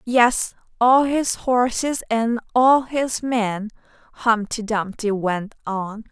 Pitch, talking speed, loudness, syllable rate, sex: 230 Hz, 120 wpm, -20 LUFS, 3.1 syllables/s, female